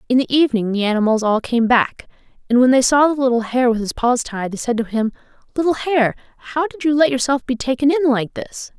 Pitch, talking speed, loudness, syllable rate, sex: 250 Hz, 240 wpm, -17 LUFS, 5.9 syllables/s, female